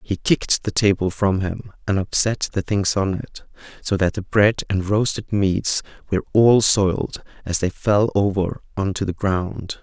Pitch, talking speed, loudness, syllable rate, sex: 100 Hz, 185 wpm, -20 LUFS, 4.5 syllables/s, male